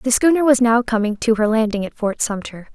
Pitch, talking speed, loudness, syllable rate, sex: 230 Hz, 240 wpm, -18 LUFS, 5.6 syllables/s, female